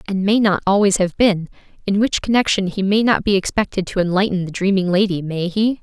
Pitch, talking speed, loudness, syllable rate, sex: 195 Hz, 215 wpm, -18 LUFS, 5.8 syllables/s, female